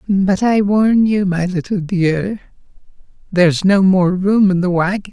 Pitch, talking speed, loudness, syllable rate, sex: 190 Hz, 165 wpm, -15 LUFS, 4.2 syllables/s, male